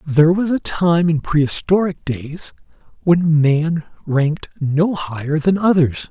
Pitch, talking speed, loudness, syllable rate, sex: 155 Hz, 140 wpm, -17 LUFS, 4.0 syllables/s, male